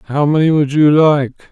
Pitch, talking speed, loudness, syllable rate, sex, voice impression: 145 Hz, 200 wpm, -12 LUFS, 4.7 syllables/s, male, masculine, adult-like, slightly thick, cool, calm, reassuring, slightly elegant